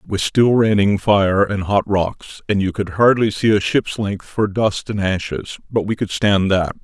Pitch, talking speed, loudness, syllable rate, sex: 100 Hz, 220 wpm, -18 LUFS, 4.3 syllables/s, male